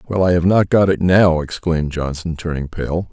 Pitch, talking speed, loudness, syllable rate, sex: 85 Hz, 210 wpm, -17 LUFS, 5.1 syllables/s, male